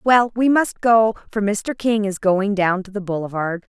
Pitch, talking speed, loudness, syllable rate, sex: 205 Hz, 210 wpm, -19 LUFS, 4.5 syllables/s, female